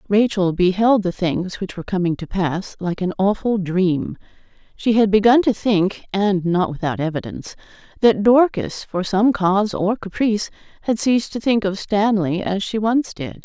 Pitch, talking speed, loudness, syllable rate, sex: 200 Hz, 175 wpm, -19 LUFS, 4.7 syllables/s, female